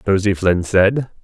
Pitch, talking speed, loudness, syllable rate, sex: 100 Hz, 145 wpm, -16 LUFS, 4.0 syllables/s, male